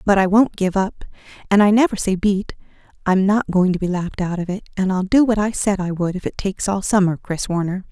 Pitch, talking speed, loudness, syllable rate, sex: 195 Hz, 260 wpm, -19 LUFS, 5.7 syllables/s, female